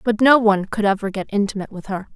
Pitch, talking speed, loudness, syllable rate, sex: 205 Hz, 250 wpm, -19 LUFS, 7.0 syllables/s, female